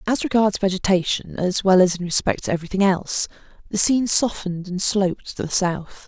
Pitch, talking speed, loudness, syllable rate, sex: 190 Hz, 200 wpm, -20 LUFS, 5.8 syllables/s, female